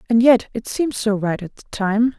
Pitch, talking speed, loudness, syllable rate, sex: 225 Hz, 245 wpm, -19 LUFS, 5.3 syllables/s, female